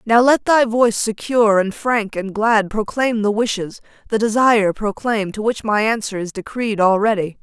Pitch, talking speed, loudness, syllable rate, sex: 215 Hz, 180 wpm, -17 LUFS, 4.8 syllables/s, female